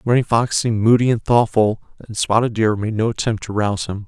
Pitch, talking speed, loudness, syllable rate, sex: 110 Hz, 220 wpm, -18 LUFS, 5.9 syllables/s, male